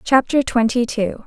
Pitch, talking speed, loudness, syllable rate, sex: 240 Hz, 145 wpm, -18 LUFS, 4.3 syllables/s, female